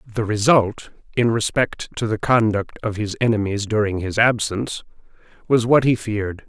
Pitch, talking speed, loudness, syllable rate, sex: 110 Hz, 155 wpm, -20 LUFS, 4.8 syllables/s, male